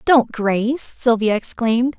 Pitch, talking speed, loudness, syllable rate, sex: 240 Hz, 120 wpm, -18 LUFS, 4.2 syllables/s, female